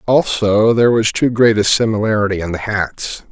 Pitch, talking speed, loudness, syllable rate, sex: 110 Hz, 180 wpm, -15 LUFS, 5.1 syllables/s, male